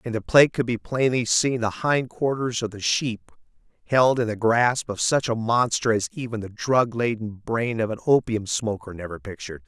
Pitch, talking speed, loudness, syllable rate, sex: 115 Hz, 205 wpm, -23 LUFS, 5.0 syllables/s, male